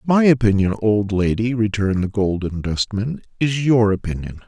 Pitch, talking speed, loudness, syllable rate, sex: 110 Hz, 145 wpm, -19 LUFS, 4.9 syllables/s, male